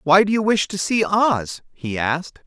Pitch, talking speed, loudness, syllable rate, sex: 180 Hz, 220 wpm, -19 LUFS, 4.5 syllables/s, male